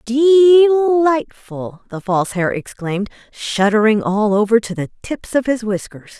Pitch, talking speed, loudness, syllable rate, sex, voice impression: 230 Hz, 145 wpm, -16 LUFS, 4.1 syllables/s, female, feminine, adult-like, fluent, slightly unique, slightly intense